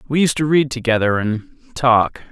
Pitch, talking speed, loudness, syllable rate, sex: 125 Hz, 180 wpm, -17 LUFS, 5.1 syllables/s, male